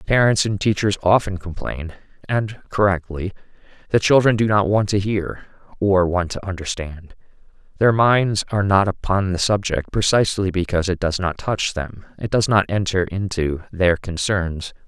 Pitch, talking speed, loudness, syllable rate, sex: 95 Hz, 150 wpm, -20 LUFS, 4.7 syllables/s, male